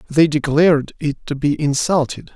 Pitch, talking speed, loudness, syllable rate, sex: 150 Hz, 155 wpm, -17 LUFS, 4.7 syllables/s, male